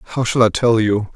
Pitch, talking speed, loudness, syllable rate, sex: 115 Hz, 260 wpm, -16 LUFS, 6.0 syllables/s, male